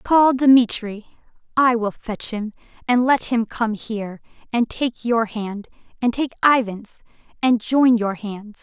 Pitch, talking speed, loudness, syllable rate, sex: 230 Hz, 145 wpm, -20 LUFS, 3.8 syllables/s, female